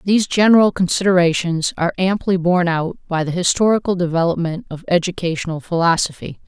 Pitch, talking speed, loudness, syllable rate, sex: 175 Hz, 130 wpm, -17 LUFS, 6.0 syllables/s, female